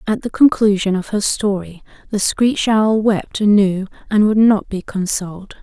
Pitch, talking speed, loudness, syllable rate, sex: 205 Hz, 170 wpm, -16 LUFS, 4.5 syllables/s, female